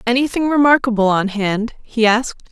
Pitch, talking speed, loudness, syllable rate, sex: 230 Hz, 145 wpm, -16 LUFS, 5.3 syllables/s, female